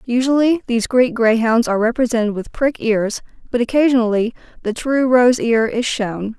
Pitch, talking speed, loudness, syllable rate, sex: 235 Hz, 160 wpm, -17 LUFS, 5.1 syllables/s, female